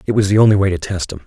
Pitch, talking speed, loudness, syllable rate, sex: 95 Hz, 380 wpm, -15 LUFS, 8.3 syllables/s, male